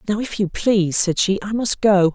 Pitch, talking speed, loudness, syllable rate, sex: 200 Hz, 250 wpm, -18 LUFS, 5.1 syllables/s, female